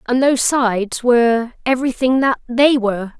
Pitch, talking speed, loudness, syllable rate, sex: 245 Hz, 130 wpm, -16 LUFS, 5.2 syllables/s, female